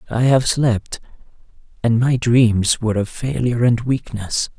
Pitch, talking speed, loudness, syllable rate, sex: 120 Hz, 145 wpm, -18 LUFS, 4.3 syllables/s, male